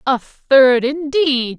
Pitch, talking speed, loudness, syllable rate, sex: 270 Hz, 115 wpm, -15 LUFS, 2.7 syllables/s, female